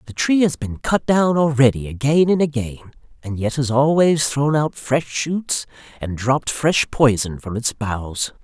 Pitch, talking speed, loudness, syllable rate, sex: 135 Hz, 180 wpm, -19 LUFS, 4.2 syllables/s, male